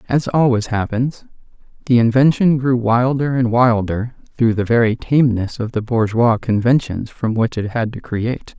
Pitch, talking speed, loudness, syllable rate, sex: 120 Hz, 160 wpm, -17 LUFS, 4.7 syllables/s, male